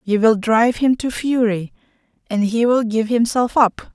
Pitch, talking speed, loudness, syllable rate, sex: 230 Hz, 185 wpm, -17 LUFS, 4.5 syllables/s, female